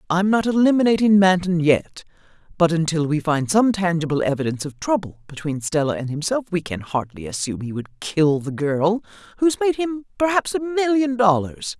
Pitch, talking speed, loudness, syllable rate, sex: 180 Hz, 175 wpm, -20 LUFS, 5.3 syllables/s, female